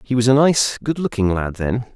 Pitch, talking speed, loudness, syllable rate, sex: 120 Hz, 245 wpm, -18 LUFS, 5.0 syllables/s, male